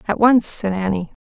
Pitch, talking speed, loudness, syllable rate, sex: 205 Hz, 195 wpm, -18 LUFS, 5.1 syllables/s, female